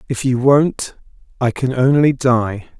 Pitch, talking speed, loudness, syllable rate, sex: 125 Hz, 130 wpm, -16 LUFS, 3.8 syllables/s, male